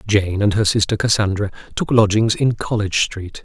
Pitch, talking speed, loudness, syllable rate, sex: 105 Hz, 175 wpm, -18 LUFS, 5.2 syllables/s, male